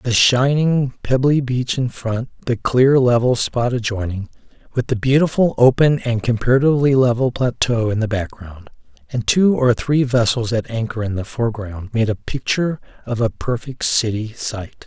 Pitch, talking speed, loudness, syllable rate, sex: 120 Hz, 160 wpm, -18 LUFS, 4.8 syllables/s, male